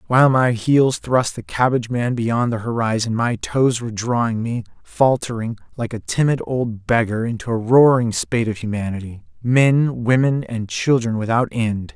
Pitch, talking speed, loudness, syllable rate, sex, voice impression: 115 Hz, 160 wpm, -19 LUFS, 4.7 syllables/s, male, very masculine, very adult-like, very middle-aged, very thick, tensed, very powerful, slightly bright, slightly soft, slightly muffled, fluent, slightly raspy, very cool, very intellectual, very sincere, very calm, very mature, very friendly, very reassuring, unique, elegant, wild, sweet, slightly lively, kind, slightly intense